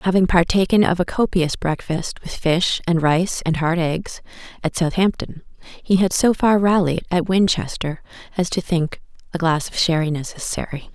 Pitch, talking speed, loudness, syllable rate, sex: 175 Hz, 165 wpm, -20 LUFS, 4.7 syllables/s, female